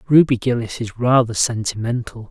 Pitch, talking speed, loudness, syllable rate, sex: 120 Hz, 130 wpm, -19 LUFS, 5.2 syllables/s, male